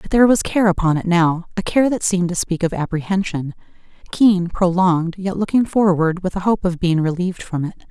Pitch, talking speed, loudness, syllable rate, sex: 185 Hz, 195 wpm, -18 LUFS, 5.6 syllables/s, female